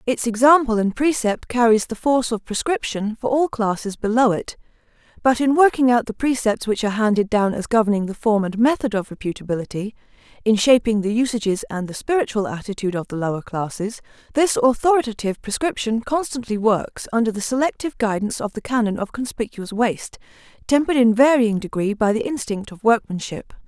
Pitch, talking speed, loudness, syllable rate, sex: 230 Hz, 165 wpm, -20 LUFS, 5.9 syllables/s, female